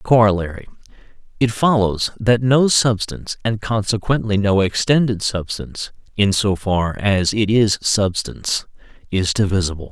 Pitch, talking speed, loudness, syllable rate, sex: 105 Hz, 115 wpm, -18 LUFS, 4.6 syllables/s, male